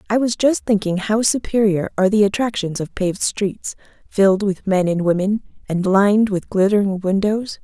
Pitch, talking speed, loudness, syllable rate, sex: 200 Hz, 175 wpm, -18 LUFS, 5.1 syllables/s, female